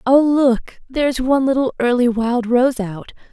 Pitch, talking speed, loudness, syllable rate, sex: 250 Hz, 165 wpm, -17 LUFS, 4.9 syllables/s, female